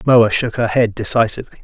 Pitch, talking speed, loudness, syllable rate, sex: 115 Hz, 185 wpm, -16 LUFS, 6.1 syllables/s, male